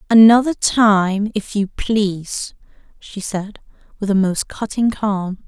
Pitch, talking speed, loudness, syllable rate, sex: 205 Hz, 130 wpm, -17 LUFS, 3.6 syllables/s, female